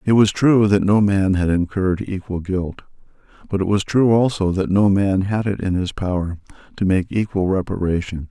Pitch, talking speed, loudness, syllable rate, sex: 95 Hz, 195 wpm, -19 LUFS, 5.1 syllables/s, male